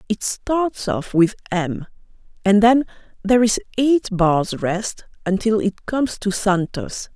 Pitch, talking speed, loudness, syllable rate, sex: 205 Hz, 145 wpm, -20 LUFS, 3.9 syllables/s, female